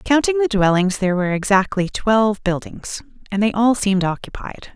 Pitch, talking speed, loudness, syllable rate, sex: 205 Hz, 165 wpm, -18 LUFS, 5.4 syllables/s, female